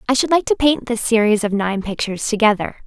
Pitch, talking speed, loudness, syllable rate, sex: 230 Hz, 230 wpm, -17 LUFS, 6.1 syllables/s, female